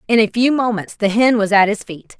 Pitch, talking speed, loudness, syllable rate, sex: 220 Hz, 275 wpm, -16 LUFS, 5.5 syllables/s, female